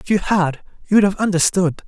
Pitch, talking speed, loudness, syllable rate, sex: 190 Hz, 190 wpm, -17 LUFS, 5.1 syllables/s, male